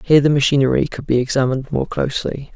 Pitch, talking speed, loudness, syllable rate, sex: 135 Hz, 190 wpm, -18 LUFS, 7.0 syllables/s, male